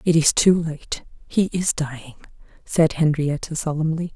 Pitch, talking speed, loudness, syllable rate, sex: 155 Hz, 145 wpm, -21 LUFS, 4.6 syllables/s, female